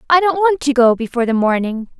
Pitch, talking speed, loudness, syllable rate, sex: 270 Hz, 240 wpm, -15 LUFS, 6.3 syllables/s, female